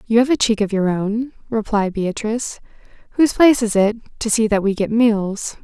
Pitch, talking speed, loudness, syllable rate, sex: 220 Hz, 200 wpm, -18 LUFS, 5.1 syllables/s, female